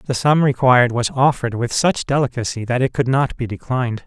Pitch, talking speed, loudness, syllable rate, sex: 130 Hz, 205 wpm, -18 LUFS, 5.7 syllables/s, male